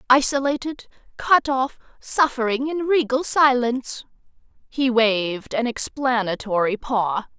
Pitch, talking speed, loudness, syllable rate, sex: 250 Hz, 80 wpm, -21 LUFS, 4.2 syllables/s, female